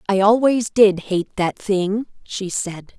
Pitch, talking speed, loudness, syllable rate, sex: 200 Hz, 160 wpm, -19 LUFS, 3.5 syllables/s, female